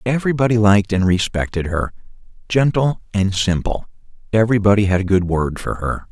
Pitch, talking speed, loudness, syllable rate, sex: 105 Hz, 135 wpm, -18 LUFS, 5.7 syllables/s, male